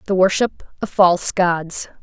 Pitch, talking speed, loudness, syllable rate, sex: 185 Hz, 150 wpm, -18 LUFS, 4.4 syllables/s, female